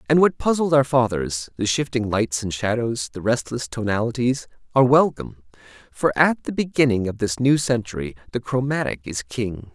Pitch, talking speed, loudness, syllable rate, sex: 115 Hz, 155 wpm, -21 LUFS, 5.2 syllables/s, male